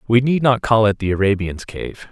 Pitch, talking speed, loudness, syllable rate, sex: 110 Hz, 225 wpm, -17 LUFS, 5.1 syllables/s, male